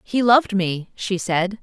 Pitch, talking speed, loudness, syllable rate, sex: 200 Hz, 185 wpm, -20 LUFS, 4.2 syllables/s, female